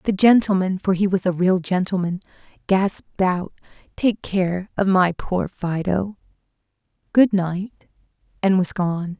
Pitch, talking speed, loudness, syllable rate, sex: 185 Hz, 125 wpm, -20 LUFS, 4.1 syllables/s, female